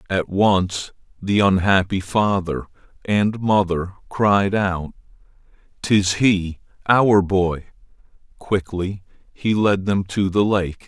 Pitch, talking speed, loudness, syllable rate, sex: 100 Hz, 110 wpm, -19 LUFS, 3.3 syllables/s, male